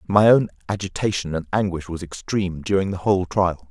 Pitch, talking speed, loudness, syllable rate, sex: 95 Hz, 180 wpm, -22 LUFS, 5.6 syllables/s, male